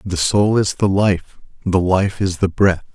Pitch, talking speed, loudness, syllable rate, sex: 95 Hz, 205 wpm, -17 LUFS, 4.0 syllables/s, male